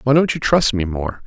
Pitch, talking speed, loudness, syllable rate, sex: 120 Hz, 285 wpm, -18 LUFS, 5.2 syllables/s, male